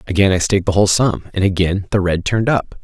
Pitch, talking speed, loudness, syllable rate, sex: 95 Hz, 255 wpm, -16 LUFS, 6.7 syllables/s, male